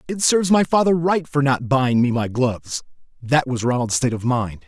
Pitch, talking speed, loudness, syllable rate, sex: 135 Hz, 220 wpm, -19 LUFS, 5.4 syllables/s, male